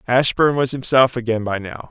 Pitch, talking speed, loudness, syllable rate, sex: 125 Hz, 190 wpm, -18 LUFS, 5.1 syllables/s, male